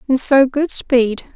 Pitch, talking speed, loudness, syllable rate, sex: 260 Hz, 180 wpm, -15 LUFS, 3.6 syllables/s, female